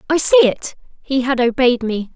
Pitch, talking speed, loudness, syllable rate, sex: 250 Hz, 195 wpm, -15 LUFS, 4.7 syllables/s, female